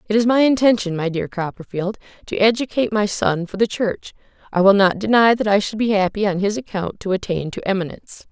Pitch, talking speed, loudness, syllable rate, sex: 205 Hz, 215 wpm, -19 LUFS, 5.9 syllables/s, female